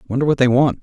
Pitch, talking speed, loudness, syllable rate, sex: 130 Hz, 290 wpm, -16 LUFS, 7.5 syllables/s, male